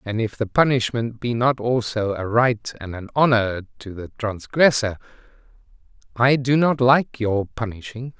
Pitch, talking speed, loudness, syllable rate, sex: 115 Hz, 155 wpm, -21 LUFS, 4.5 syllables/s, male